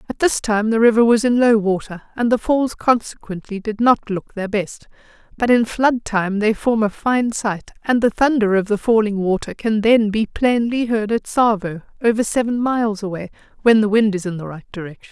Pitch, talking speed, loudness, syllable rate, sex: 220 Hz, 210 wpm, -18 LUFS, 5.1 syllables/s, female